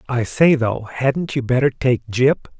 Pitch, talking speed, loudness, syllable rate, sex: 130 Hz, 185 wpm, -18 LUFS, 4.4 syllables/s, male